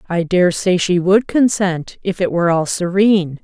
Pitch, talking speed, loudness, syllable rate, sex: 180 Hz, 175 wpm, -16 LUFS, 4.8 syllables/s, female